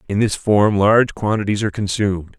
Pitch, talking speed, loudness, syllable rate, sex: 105 Hz, 175 wpm, -17 LUFS, 5.9 syllables/s, male